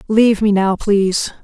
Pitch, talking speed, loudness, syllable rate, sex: 205 Hz, 170 wpm, -15 LUFS, 5.1 syllables/s, female